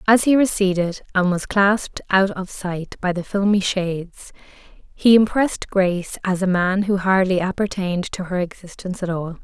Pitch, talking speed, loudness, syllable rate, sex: 190 Hz, 170 wpm, -20 LUFS, 4.7 syllables/s, female